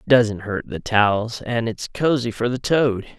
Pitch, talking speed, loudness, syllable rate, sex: 115 Hz, 205 wpm, -21 LUFS, 4.3 syllables/s, male